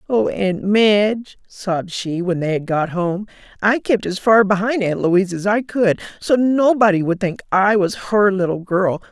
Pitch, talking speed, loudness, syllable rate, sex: 200 Hz, 190 wpm, -18 LUFS, 4.4 syllables/s, female